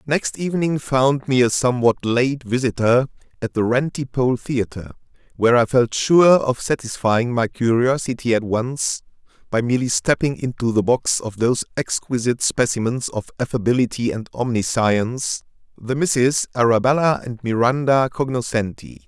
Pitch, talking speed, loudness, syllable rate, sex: 125 Hz, 130 wpm, -19 LUFS, 5.0 syllables/s, male